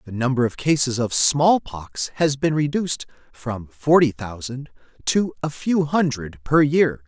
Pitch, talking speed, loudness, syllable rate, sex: 135 Hz, 160 wpm, -21 LUFS, 4.2 syllables/s, male